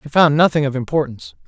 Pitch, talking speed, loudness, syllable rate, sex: 145 Hz, 205 wpm, -17 LUFS, 7.0 syllables/s, male